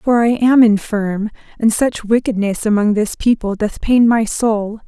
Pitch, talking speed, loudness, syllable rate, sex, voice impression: 220 Hz, 170 wpm, -15 LUFS, 4.2 syllables/s, female, very feminine, young, slightly adult-like, very thin, slightly tensed, slightly weak, slightly dark, hard, clear, fluent, slightly raspy, slightly cute, cool, very intellectual, refreshing, very sincere, very calm, very friendly, very reassuring, unique, elegant, slightly wild, sweet, lively, strict, slightly intense, slightly sharp, slightly modest, light